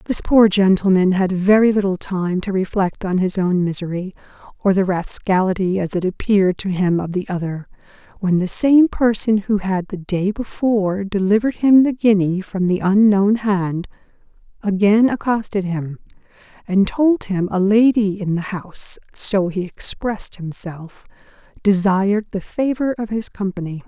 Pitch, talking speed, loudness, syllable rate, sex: 195 Hz, 155 wpm, -18 LUFS, 4.5 syllables/s, female